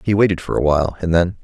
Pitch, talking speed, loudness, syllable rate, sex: 90 Hz, 290 wpm, -17 LUFS, 7.1 syllables/s, male